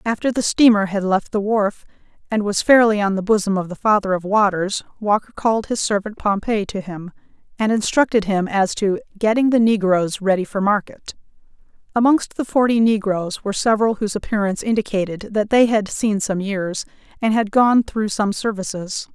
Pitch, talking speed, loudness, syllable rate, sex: 210 Hz, 180 wpm, -19 LUFS, 5.3 syllables/s, female